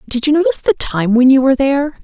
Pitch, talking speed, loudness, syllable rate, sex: 275 Hz, 265 wpm, -13 LUFS, 7.3 syllables/s, female